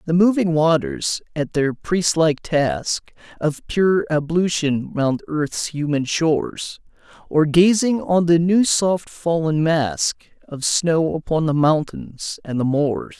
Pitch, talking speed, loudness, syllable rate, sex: 160 Hz, 135 wpm, -19 LUFS, 3.5 syllables/s, male